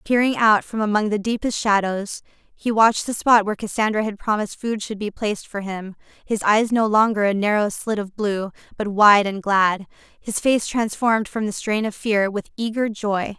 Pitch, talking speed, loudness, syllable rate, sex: 210 Hz, 200 wpm, -20 LUFS, 5.0 syllables/s, female